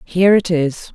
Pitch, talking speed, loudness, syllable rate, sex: 170 Hz, 190 wpm, -15 LUFS, 4.8 syllables/s, female